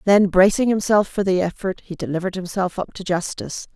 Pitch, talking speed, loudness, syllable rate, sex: 190 Hz, 190 wpm, -20 LUFS, 6.0 syllables/s, female